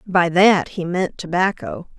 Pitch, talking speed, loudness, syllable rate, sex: 180 Hz, 150 wpm, -18 LUFS, 3.9 syllables/s, female